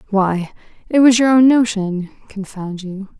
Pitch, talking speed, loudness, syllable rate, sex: 210 Hz, 150 wpm, -15 LUFS, 4.2 syllables/s, female